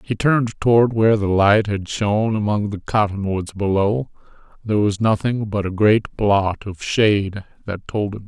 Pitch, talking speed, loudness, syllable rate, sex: 105 Hz, 180 wpm, -19 LUFS, 5.0 syllables/s, male